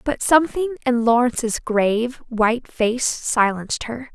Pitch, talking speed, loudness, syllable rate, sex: 240 Hz, 130 wpm, -20 LUFS, 4.6 syllables/s, female